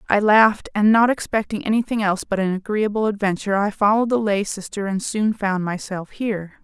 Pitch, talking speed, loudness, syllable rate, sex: 205 Hz, 190 wpm, -20 LUFS, 5.9 syllables/s, female